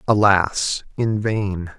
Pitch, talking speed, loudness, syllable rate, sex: 100 Hz, 100 wpm, -20 LUFS, 2.7 syllables/s, male